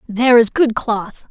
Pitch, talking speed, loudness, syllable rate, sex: 230 Hz, 185 wpm, -15 LUFS, 4.5 syllables/s, female